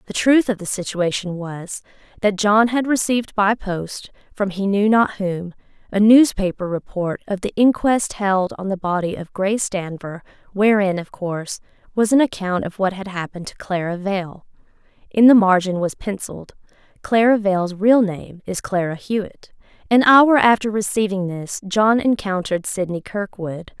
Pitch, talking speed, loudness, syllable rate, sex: 200 Hz, 160 wpm, -19 LUFS, 4.7 syllables/s, female